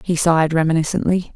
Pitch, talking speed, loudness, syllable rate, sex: 165 Hz, 135 wpm, -17 LUFS, 6.4 syllables/s, female